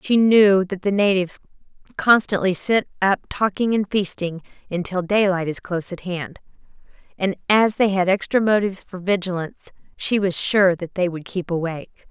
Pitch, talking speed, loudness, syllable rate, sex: 190 Hz, 165 wpm, -20 LUFS, 5.1 syllables/s, female